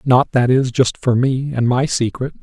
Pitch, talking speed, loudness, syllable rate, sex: 125 Hz, 225 wpm, -17 LUFS, 4.4 syllables/s, male